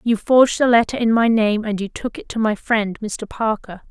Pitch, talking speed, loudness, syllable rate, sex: 225 Hz, 245 wpm, -18 LUFS, 5.1 syllables/s, female